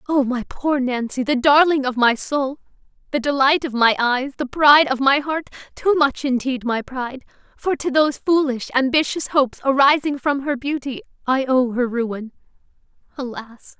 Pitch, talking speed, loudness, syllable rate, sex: 270 Hz, 170 wpm, -19 LUFS, 4.8 syllables/s, female